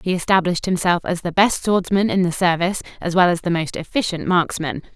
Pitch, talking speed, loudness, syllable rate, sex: 175 Hz, 205 wpm, -19 LUFS, 5.9 syllables/s, female